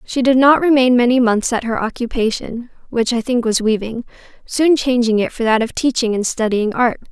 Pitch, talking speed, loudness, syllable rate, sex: 240 Hz, 185 wpm, -16 LUFS, 5.3 syllables/s, female